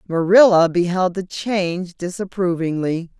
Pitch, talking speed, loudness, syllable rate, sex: 180 Hz, 95 wpm, -18 LUFS, 4.4 syllables/s, female